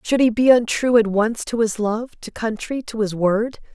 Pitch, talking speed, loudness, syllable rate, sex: 225 Hz, 225 wpm, -19 LUFS, 4.5 syllables/s, female